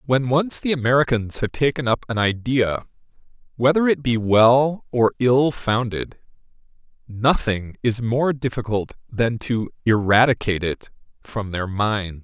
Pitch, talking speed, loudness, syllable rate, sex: 120 Hz, 130 wpm, -20 LUFS, 4.2 syllables/s, male